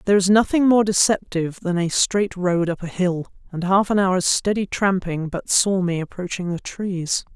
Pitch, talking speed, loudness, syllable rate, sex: 185 Hz, 195 wpm, -20 LUFS, 4.8 syllables/s, female